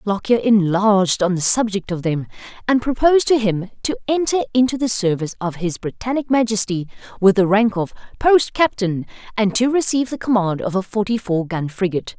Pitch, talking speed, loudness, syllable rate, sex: 210 Hz, 180 wpm, -18 LUFS, 5.6 syllables/s, female